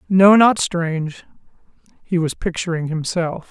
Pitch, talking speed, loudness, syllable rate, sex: 175 Hz, 105 wpm, -18 LUFS, 4.3 syllables/s, male